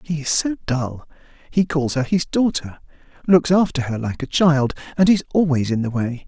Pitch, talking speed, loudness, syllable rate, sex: 150 Hz, 200 wpm, -19 LUFS, 5.0 syllables/s, male